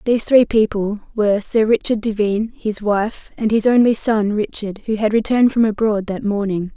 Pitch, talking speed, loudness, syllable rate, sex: 215 Hz, 185 wpm, -18 LUFS, 5.2 syllables/s, female